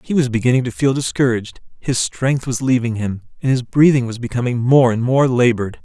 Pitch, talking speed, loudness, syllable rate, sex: 125 Hz, 205 wpm, -17 LUFS, 5.8 syllables/s, male